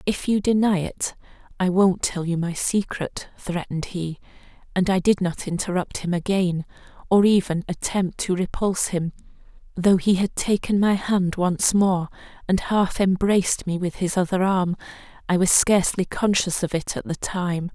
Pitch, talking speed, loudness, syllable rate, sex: 185 Hz, 170 wpm, -22 LUFS, 4.7 syllables/s, female